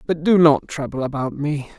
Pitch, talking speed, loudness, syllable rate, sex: 145 Hz, 200 wpm, -19 LUFS, 5.0 syllables/s, male